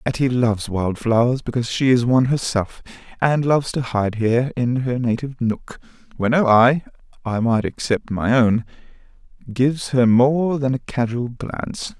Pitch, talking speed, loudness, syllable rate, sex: 125 Hz, 165 wpm, -19 LUFS, 4.7 syllables/s, male